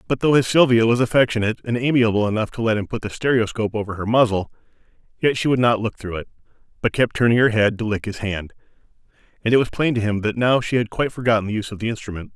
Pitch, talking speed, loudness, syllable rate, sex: 115 Hz, 250 wpm, -20 LUFS, 7.1 syllables/s, male